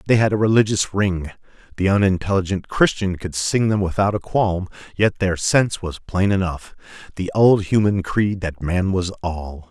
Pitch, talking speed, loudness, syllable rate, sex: 95 Hz, 165 wpm, -20 LUFS, 4.7 syllables/s, male